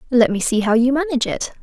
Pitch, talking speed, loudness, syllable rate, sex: 250 Hz, 260 wpm, -18 LUFS, 6.8 syllables/s, female